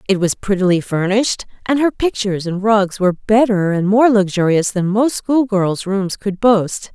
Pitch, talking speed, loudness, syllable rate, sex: 205 Hz, 175 wpm, -16 LUFS, 4.7 syllables/s, female